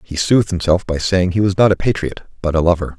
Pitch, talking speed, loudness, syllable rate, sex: 90 Hz, 260 wpm, -16 LUFS, 6.2 syllables/s, male